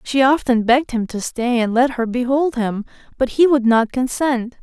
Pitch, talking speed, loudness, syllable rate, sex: 250 Hz, 210 wpm, -18 LUFS, 4.8 syllables/s, female